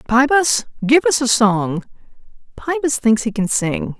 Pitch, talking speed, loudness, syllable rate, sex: 245 Hz, 150 wpm, -16 LUFS, 4.2 syllables/s, female